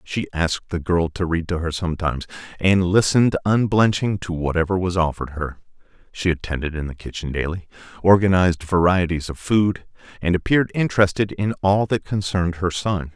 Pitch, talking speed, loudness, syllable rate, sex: 90 Hz, 165 wpm, -21 LUFS, 5.6 syllables/s, male